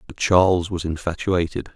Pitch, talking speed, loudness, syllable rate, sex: 90 Hz, 135 wpm, -21 LUFS, 5.1 syllables/s, male